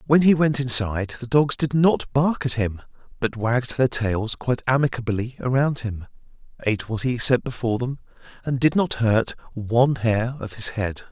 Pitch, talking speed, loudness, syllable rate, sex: 120 Hz, 185 wpm, -22 LUFS, 5.0 syllables/s, male